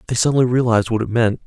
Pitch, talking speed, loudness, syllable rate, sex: 115 Hz, 245 wpm, -17 LUFS, 8.1 syllables/s, male